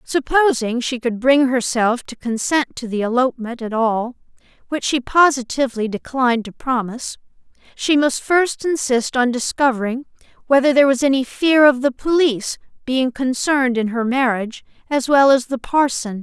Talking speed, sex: 160 wpm, female